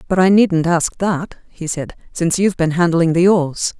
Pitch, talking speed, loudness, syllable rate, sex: 175 Hz, 205 wpm, -16 LUFS, 4.8 syllables/s, female